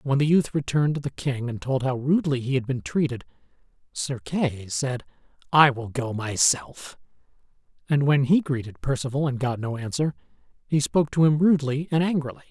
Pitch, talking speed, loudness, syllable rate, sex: 140 Hz, 185 wpm, -24 LUFS, 5.5 syllables/s, male